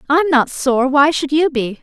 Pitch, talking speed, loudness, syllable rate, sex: 280 Hz, 230 wpm, -15 LUFS, 4.3 syllables/s, female